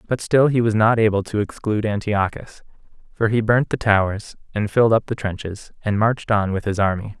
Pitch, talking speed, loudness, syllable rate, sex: 105 Hz, 210 wpm, -20 LUFS, 5.6 syllables/s, male